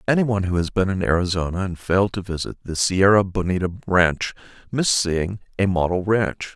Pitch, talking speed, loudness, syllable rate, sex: 95 Hz, 185 wpm, -21 LUFS, 5.5 syllables/s, male